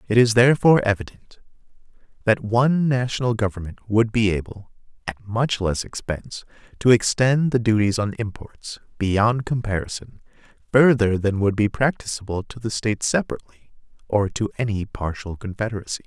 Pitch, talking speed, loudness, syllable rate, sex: 110 Hz, 140 wpm, -21 LUFS, 5.3 syllables/s, male